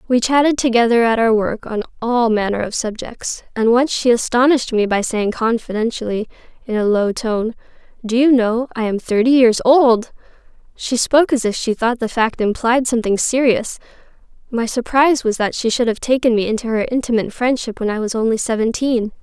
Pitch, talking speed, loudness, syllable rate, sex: 230 Hz, 185 wpm, -17 LUFS, 5.5 syllables/s, female